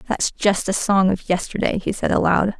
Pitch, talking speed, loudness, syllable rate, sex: 195 Hz, 210 wpm, -20 LUFS, 5.1 syllables/s, female